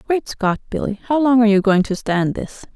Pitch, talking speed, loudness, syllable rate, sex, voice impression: 220 Hz, 240 wpm, -18 LUFS, 5.5 syllables/s, female, very feminine, middle-aged, very thin, slightly tensed, weak, dark, soft, clear, fluent, slightly raspy, slightly cool, very intellectual, refreshing, sincere, very calm, very friendly, very reassuring, very unique, very elegant, slightly wild, sweet, slightly lively, very kind, modest, slightly light